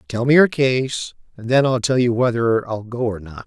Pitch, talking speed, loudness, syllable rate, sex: 120 Hz, 245 wpm, -18 LUFS, 4.8 syllables/s, male